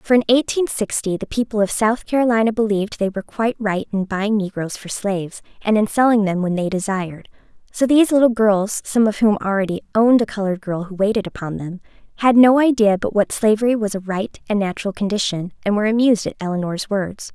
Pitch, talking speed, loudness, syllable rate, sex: 210 Hz, 210 wpm, -19 LUFS, 6.1 syllables/s, female